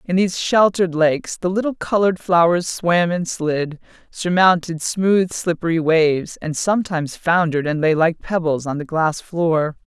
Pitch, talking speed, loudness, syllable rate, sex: 170 Hz, 160 wpm, -18 LUFS, 4.8 syllables/s, female